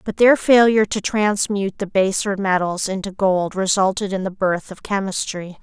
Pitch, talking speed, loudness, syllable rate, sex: 195 Hz, 170 wpm, -19 LUFS, 4.9 syllables/s, female